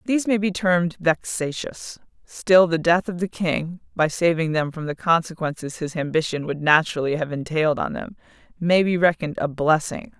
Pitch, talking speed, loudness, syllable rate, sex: 165 Hz, 175 wpm, -22 LUFS, 5.2 syllables/s, female